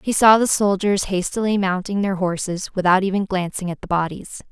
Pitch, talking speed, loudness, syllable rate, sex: 190 Hz, 185 wpm, -20 LUFS, 5.3 syllables/s, female